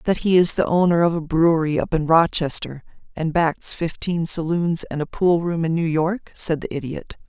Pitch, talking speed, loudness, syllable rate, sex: 165 Hz, 205 wpm, -20 LUFS, 4.9 syllables/s, female